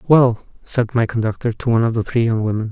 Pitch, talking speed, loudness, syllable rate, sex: 115 Hz, 245 wpm, -18 LUFS, 6.3 syllables/s, male